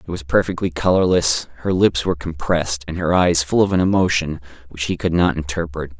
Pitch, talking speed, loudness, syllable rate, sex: 85 Hz, 200 wpm, -19 LUFS, 5.7 syllables/s, male